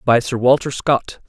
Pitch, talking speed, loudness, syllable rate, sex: 125 Hz, 190 wpm, -17 LUFS, 4.4 syllables/s, male